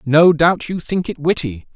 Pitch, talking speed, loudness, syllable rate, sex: 155 Hz, 205 wpm, -16 LUFS, 4.4 syllables/s, male